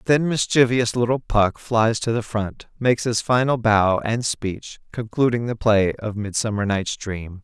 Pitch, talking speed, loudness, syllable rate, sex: 115 Hz, 170 wpm, -21 LUFS, 4.3 syllables/s, male